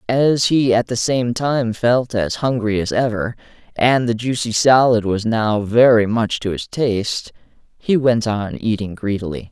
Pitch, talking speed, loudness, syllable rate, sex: 115 Hz, 170 wpm, -17 LUFS, 4.2 syllables/s, male